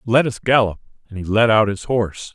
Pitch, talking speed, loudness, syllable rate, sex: 110 Hz, 230 wpm, -18 LUFS, 5.6 syllables/s, male